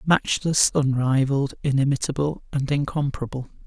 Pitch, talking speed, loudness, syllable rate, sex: 140 Hz, 80 wpm, -23 LUFS, 5.3 syllables/s, male